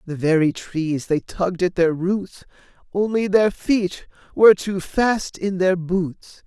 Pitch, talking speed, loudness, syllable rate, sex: 185 Hz, 160 wpm, -20 LUFS, 3.8 syllables/s, male